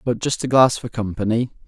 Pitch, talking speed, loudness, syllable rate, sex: 115 Hz, 215 wpm, -20 LUFS, 5.6 syllables/s, male